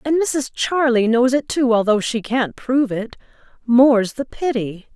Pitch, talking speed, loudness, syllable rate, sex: 245 Hz, 155 wpm, -18 LUFS, 4.4 syllables/s, female